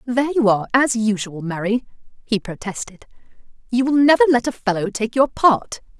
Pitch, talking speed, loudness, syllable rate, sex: 230 Hz, 170 wpm, -19 LUFS, 5.5 syllables/s, female